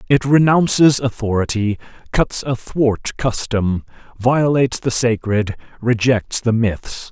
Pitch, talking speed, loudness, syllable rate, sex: 120 Hz, 100 wpm, -17 LUFS, 3.8 syllables/s, male